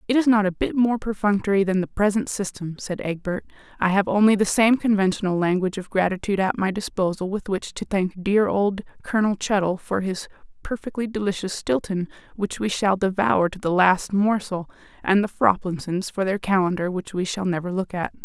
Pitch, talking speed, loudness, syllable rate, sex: 195 Hz, 190 wpm, -23 LUFS, 5.5 syllables/s, female